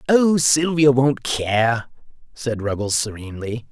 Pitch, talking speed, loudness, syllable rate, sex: 125 Hz, 115 wpm, -19 LUFS, 4.0 syllables/s, male